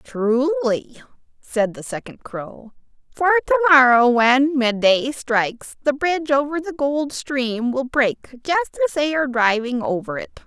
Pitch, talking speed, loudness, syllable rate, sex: 270 Hz, 150 wpm, -19 LUFS, 4.2 syllables/s, female